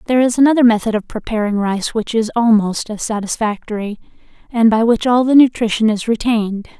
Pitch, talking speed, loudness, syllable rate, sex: 225 Hz, 175 wpm, -15 LUFS, 5.9 syllables/s, female